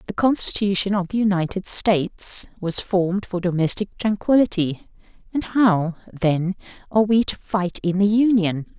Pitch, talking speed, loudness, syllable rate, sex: 195 Hz, 145 wpm, -20 LUFS, 4.6 syllables/s, female